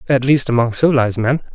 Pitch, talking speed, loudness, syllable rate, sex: 125 Hz, 195 wpm, -15 LUFS, 7.1 syllables/s, male